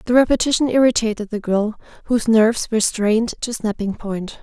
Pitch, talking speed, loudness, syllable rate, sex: 225 Hz, 165 wpm, -19 LUFS, 6.0 syllables/s, female